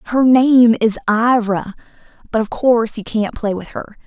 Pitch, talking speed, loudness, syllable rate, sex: 230 Hz, 175 wpm, -15 LUFS, 4.3 syllables/s, female